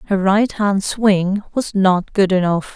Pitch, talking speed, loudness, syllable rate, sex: 195 Hz, 175 wpm, -17 LUFS, 3.7 syllables/s, female